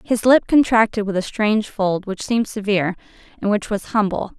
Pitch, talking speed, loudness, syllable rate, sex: 210 Hz, 190 wpm, -19 LUFS, 5.5 syllables/s, female